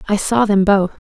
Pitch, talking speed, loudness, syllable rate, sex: 205 Hz, 225 wpm, -15 LUFS, 5.0 syllables/s, female